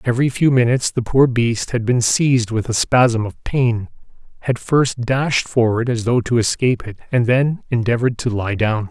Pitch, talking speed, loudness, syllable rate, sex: 120 Hz, 195 wpm, -17 LUFS, 5.0 syllables/s, male